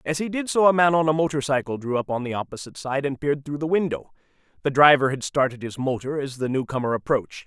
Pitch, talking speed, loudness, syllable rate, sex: 140 Hz, 240 wpm, -23 LUFS, 6.6 syllables/s, male